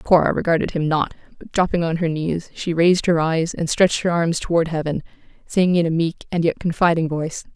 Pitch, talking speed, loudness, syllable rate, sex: 165 Hz, 215 wpm, -20 LUFS, 5.8 syllables/s, female